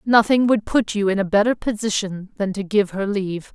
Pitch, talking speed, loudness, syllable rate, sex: 205 Hz, 220 wpm, -20 LUFS, 5.3 syllables/s, female